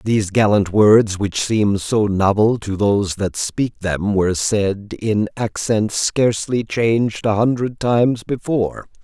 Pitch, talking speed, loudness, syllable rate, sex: 105 Hz, 145 wpm, -18 LUFS, 4.0 syllables/s, male